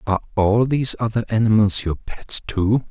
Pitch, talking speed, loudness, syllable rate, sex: 110 Hz, 165 wpm, -19 LUFS, 5.1 syllables/s, male